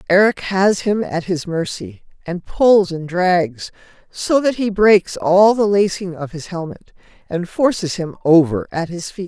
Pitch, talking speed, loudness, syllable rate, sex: 185 Hz, 175 wpm, -17 LUFS, 4.1 syllables/s, female